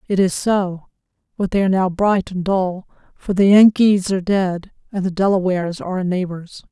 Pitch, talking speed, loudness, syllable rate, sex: 190 Hz, 190 wpm, -18 LUFS, 5.3 syllables/s, female